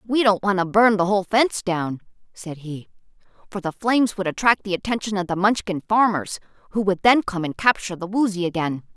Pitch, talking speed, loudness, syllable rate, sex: 195 Hz, 210 wpm, -21 LUFS, 5.8 syllables/s, female